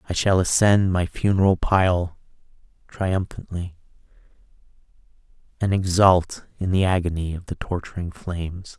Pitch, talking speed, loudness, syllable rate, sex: 90 Hz, 110 wpm, -22 LUFS, 4.5 syllables/s, male